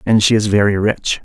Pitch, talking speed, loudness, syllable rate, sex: 105 Hz, 240 wpm, -14 LUFS, 5.4 syllables/s, male